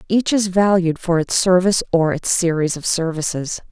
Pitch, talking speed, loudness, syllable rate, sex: 175 Hz, 180 wpm, -18 LUFS, 5.0 syllables/s, female